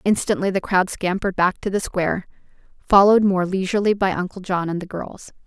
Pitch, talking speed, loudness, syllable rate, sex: 190 Hz, 185 wpm, -20 LUFS, 5.9 syllables/s, female